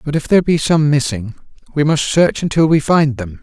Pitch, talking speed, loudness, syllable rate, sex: 145 Hz, 230 wpm, -15 LUFS, 5.4 syllables/s, male